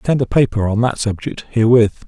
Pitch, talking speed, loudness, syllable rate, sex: 120 Hz, 230 wpm, -16 LUFS, 6.3 syllables/s, male